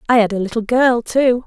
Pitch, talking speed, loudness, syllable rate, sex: 235 Hz, 245 wpm, -16 LUFS, 5.4 syllables/s, female